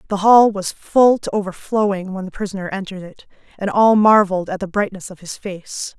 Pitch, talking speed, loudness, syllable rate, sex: 195 Hz, 200 wpm, -17 LUFS, 5.5 syllables/s, female